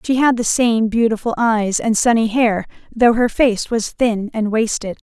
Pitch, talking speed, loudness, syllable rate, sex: 225 Hz, 190 wpm, -17 LUFS, 4.3 syllables/s, female